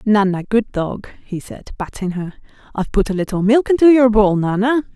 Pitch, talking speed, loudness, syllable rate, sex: 215 Hz, 205 wpm, -16 LUFS, 5.4 syllables/s, female